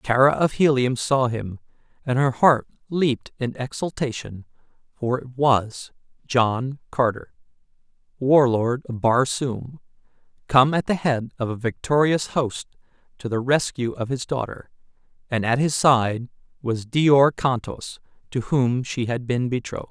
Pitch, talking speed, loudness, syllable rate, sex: 130 Hz, 150 wpm, -22 LUFS, 4.4 syllables/s, male